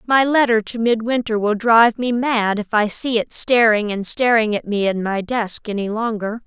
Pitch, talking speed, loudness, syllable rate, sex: 225 Hz, 205 wpm, -18 LUFS, 4.8 syllables/s, female